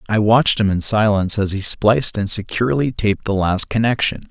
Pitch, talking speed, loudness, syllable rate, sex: 105 Hz, 195 wpm, -17 LUFS, 5.7 syllables/s, male